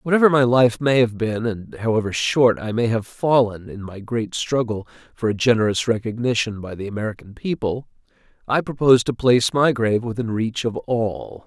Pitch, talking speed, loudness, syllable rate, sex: 115 Hz, 185 wpm, -20 LUFS, 5.2 syllables/s, male